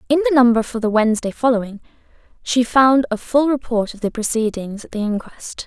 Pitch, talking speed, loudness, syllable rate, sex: 240 Hz, 190 wpm, -18 LUFS, 5.7 syllables/s, female